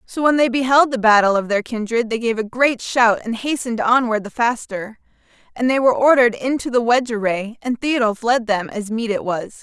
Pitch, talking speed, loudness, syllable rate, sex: 235 Hz, 220 wpm, -18 LUFS, 5.5 syllables/s, female